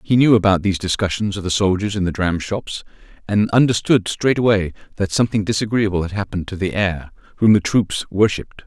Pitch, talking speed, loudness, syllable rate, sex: 100 Hz, 180 wpm, -18 LUFS, 5.8 syllables/s, male